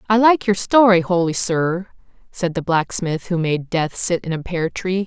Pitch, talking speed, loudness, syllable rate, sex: 180 Hz, 200 wpm, -18 LUFS, 4.4 syllables/s, female